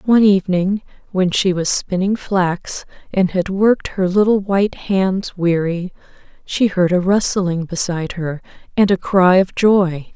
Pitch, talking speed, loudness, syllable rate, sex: 185 Hz, 155 wpm, -17 LUFS, 4.3 syllables/s, female